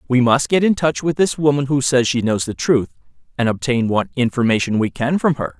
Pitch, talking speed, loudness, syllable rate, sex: 130 Hz, 235 wpm, -18 LUFS, 5.6 syllables/s, male